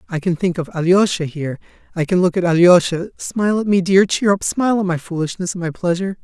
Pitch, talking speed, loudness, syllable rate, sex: 180 Hz, 230 wpm, -17 LUFS, 6.2 syllables/s, male